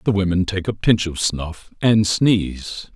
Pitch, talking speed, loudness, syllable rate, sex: 95 Hz, 180 wpm, -19 LUFS, 4.0 syllables/s, male